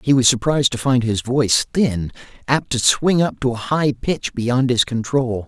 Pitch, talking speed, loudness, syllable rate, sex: 125 Hz, 210 wpm, -18 LUFS, 4.7 syllables/s, male